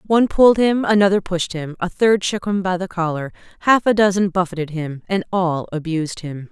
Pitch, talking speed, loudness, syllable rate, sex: 185 Hz, 205 wpm, -18 LUFS, 5.5 syllables/s, female